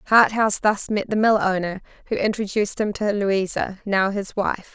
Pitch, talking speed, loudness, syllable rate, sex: 205 Hz, 175 wpm, -21 LUFS, 5.0 syllables/s, female